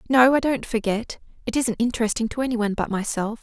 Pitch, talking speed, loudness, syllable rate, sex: 230 Hz, 195 wpm, -23 LUFS, 6.1 syllables/s, female